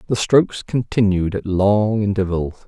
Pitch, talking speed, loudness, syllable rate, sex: 100 Hz, 135 wpm, -18 LUFS, 4.7 syllables/s, male